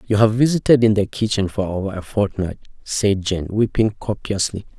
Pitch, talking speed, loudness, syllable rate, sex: 105 Hz, 175 wpm, -19 LUFS, 5.2 syllables/s, male